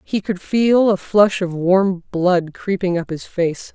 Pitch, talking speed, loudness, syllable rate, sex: 185 Hz, 190 wpm, -18 LUFS, 3.6 syllables/s, female